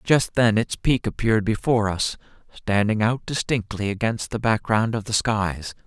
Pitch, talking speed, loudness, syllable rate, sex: 110 Hz, 165 wpm, -22 LUFS, 4.7 syllables/s, male